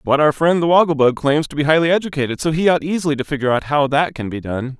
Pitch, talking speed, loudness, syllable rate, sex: 150 Hz, 290 wpm, -17 LUFS, 6.8 syllables/s, male